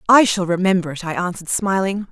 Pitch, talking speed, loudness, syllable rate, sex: 185 Hz, 200 wpm, -18 LUFS, 6.2 syllables/s, female